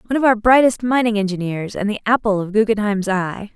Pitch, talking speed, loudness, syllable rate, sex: 215 Hz, 205 wpm, -18 LUFS, 6.1 syllables/s, female